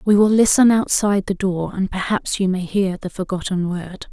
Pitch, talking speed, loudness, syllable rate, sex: 190 Hz, 205 wpm, -19 LUFS, 5.1 syllables/s, female